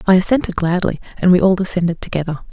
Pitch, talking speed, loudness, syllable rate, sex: 180 Hz, 190 wpm, -17 LUFS, 7.1 syllables/s, female